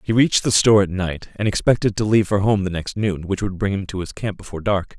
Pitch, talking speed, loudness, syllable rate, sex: 100 Hz, 290 wpm, -20 LUFS, 6.4 syllables/s, male